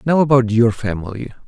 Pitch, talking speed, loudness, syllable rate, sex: 120 Hz, 165 wpm, -16 LUFS, 5.7 syllables/s, male